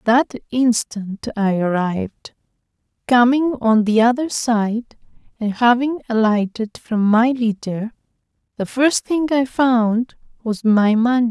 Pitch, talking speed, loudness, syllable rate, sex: 230 Hz, 120 wpm, -18 LUFS, 3.7 syllables/s, female